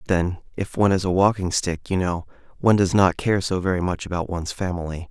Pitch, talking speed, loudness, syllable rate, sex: 90 Hz, 235 wpm, -22 LUFS, 6.2 syllables/s, male